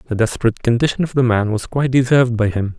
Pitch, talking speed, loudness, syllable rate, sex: 120 Hz, 235 wpm, -17 LUFS, 7.3 syllables/s, male